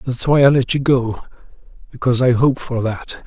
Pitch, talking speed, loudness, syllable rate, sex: 125 Hz, 200 wpm, -16 LUFS, 5.3 syllables/s, male